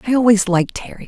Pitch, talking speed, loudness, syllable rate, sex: 220 Hz, 225 wpm, -16 LUFS, 7.5 syllables/s, female